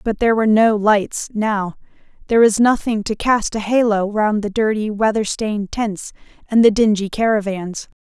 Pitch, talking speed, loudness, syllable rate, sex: 215 Hz, 170 wpm, -17 LUFS, 4.9 syllables/s, female